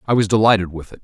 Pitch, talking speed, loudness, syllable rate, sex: 100 Hz, 290 wpm, -16 LUFS, 8.1 syllables/s, male